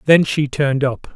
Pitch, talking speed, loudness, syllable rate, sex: 140 Hz, 210 wpm, -17 LUFS, 5.1 syllables/s, male